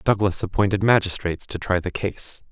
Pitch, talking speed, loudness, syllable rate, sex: 95 Hz, 165 wpm, -22 LUFS, 5.5 syllables/s, male